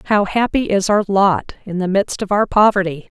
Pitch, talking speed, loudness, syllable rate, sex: 200 Hz, 205 wpm, -16 LUFS, 5.1 syllables/s, female